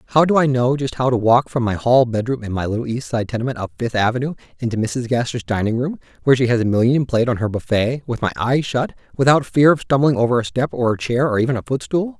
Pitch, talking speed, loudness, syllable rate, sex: 125 Hz, 265 wpm, -19 LUFS, 6.5 syllables/s, male